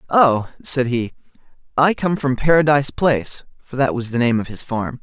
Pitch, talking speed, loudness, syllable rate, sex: 130 Hz, 190 wpm, -18 LUFS, 5.1 syllables/s, male